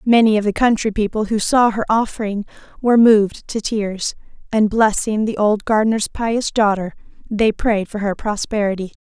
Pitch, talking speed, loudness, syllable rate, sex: 215 Hz, 165 wpm, -18 LUFS, 5.0 syllables/s, female